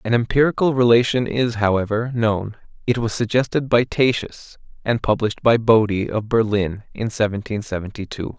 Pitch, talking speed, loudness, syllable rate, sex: 115 Hz, 150 wpm, -20 LUFS, 5.3 syllables/s, male